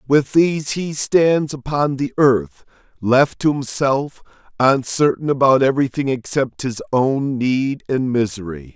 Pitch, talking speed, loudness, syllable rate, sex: 135 Hz, 130 wpm, -18 LUFS, 4.0 syllables/s, male